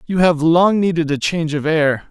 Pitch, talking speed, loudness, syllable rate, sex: 165 Hz, 230 wpm, -16 LUFS, 5.1 syllables/s, male